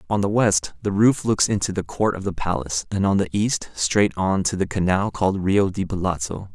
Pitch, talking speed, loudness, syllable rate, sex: 95 Hz, 230 wpm, -21 LUFS, 5.2 syllables/s, male